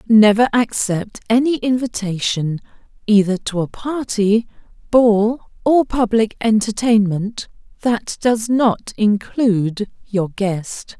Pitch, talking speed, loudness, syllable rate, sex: 215 Hz, 100 wpm, -17 LUFS, 3.5 syllables/s, female